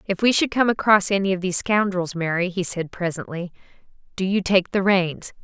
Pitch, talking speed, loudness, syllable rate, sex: 190 Hz, 200 wpm, -21 LUFS, 5.5 syllables/s, female